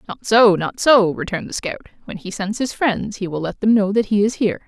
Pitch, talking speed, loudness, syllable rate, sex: 205 Hz, 270 wpm, -18 LUFS, 5.8 syllables/s, female